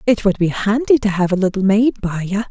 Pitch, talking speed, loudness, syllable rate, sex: 205 Hz, 265 wpm, -17 LUFS, 5.8 syllables/s, female